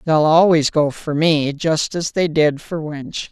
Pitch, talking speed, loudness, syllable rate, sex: 155 Hz, 200 wpm, -17 LUFS, 3.8 syllables/s, female